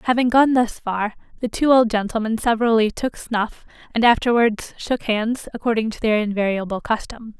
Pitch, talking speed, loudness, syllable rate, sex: 225 Hz, 160 wpm, -20 LUFS, 5.2 syllables/s, female